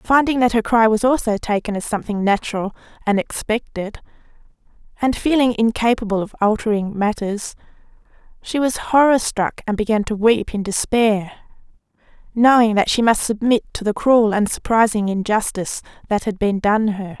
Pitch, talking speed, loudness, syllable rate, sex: 220 Hz, 155 wpm, -18 LUFS, 5.1 syllables/s, female